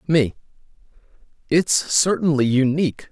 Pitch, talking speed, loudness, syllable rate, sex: 145 Hz, 75 wpm, -19 LUFS, 4.4 syllables/s, male